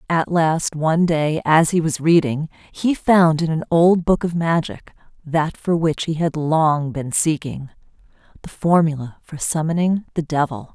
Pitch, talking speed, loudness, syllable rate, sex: 160 Hz, 160 wpm, -19 LUFS, 4.3 syllables/s, female